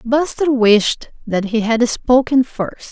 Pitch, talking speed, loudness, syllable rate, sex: 240 Hz, 145 wpm, -16 LUFS, 3.4 syllables/s, female